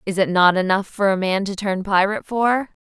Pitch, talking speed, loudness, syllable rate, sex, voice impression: 195 Hz, 230 wpm, -19 LUFS, 5.3 syllables/s, female, feminine, adult-like, slightly bright, slightly soft, clear, fluent, intellectual, calm, elegant, lively, slightly strict, slightly sharp